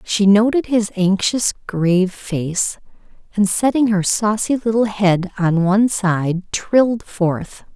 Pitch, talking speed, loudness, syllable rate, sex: 200 Hz, 130 wpm, -17 LUFS, 3.7 syllables/s, female